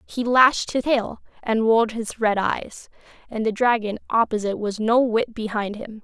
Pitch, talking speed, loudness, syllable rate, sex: 225 Hz, 180 wpm, -21 LUFS, 4.6 syllables/s, female